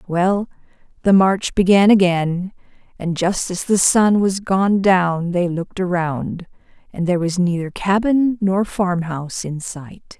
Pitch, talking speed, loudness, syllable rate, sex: 185 Hz, 155 wpm, -18 LUFS, 4.0 syllables/s, female